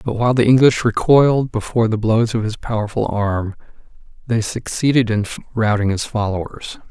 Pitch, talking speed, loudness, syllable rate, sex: 115 Hz, 155 wpm, -17 LUFS, 5.4 syllables/s, male